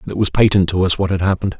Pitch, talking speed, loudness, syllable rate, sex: 95 Hz, 300 wpm, -16 LUFS, 7.7 syllables/s, male